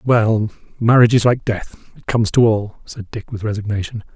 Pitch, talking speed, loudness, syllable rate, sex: 110 Hz, 190 wpm, -17 LUFS, 5.4 syllables/s, male